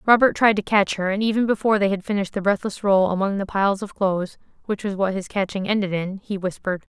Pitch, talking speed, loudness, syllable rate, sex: 200 Hz, 240 wpm, -22 LUFS, 6.5 syllables/s, female